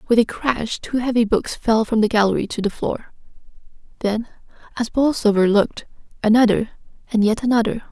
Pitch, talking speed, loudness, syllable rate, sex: 225 Hz, 160 wpm, -19 LUFS, 5.6 syllables/s, female